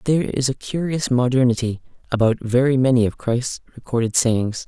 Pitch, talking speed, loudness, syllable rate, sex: 125 Hz, 155 wpm, -20 LUFS, 5.4 syllables/s, male